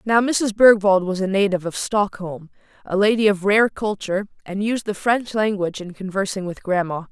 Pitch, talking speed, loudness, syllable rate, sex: 200 Hz, 185 wpm, -20 LUFS, 5.3 syllables/s, female